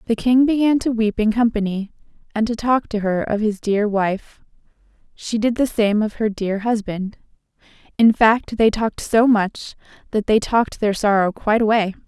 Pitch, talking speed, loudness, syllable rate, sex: 220 Hz, 180 wpm, -19 LUFS, 4.8 syllables/s, female